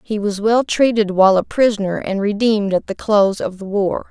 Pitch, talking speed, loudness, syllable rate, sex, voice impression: 205 Hz, 220 wpm, -17 LUFS, 5.5 syllables/s, female, feminine, adult-like, tensed, powerful, slightly hard, clear, fluent, calm, slightly friendly, elegant, lively, slightly strict, slightly intense, sharp